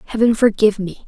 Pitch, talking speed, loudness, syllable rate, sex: 215 Hz, 170 wpm, -16 LUFS, 6.7 syllables/s, female